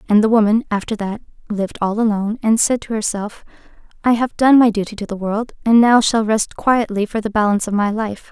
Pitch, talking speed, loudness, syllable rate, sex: 220 Hz, 225 wpm, -17 LUFS, 5.8 syllables/s, female